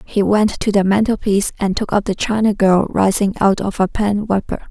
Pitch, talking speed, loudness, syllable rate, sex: 200 Hz, 230 wpm, -16 LUFS, 5.3 syllables/s, female